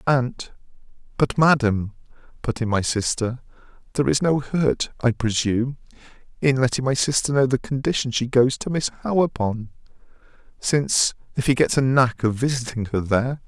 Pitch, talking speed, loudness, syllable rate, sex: 125 Hz, 165 wpm, -22 LUFS, 5.2 syllables/s, male